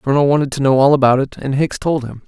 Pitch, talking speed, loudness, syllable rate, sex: 135 Hz, 315 wpm, -15 LUFS, 7.4 syllables/s, male